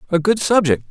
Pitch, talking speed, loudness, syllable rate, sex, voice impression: 180 Hz, 200 wpm, -16 LUFS, 6.1 syllables/s, male, masculine, adult-like, refreshing, slightly sincere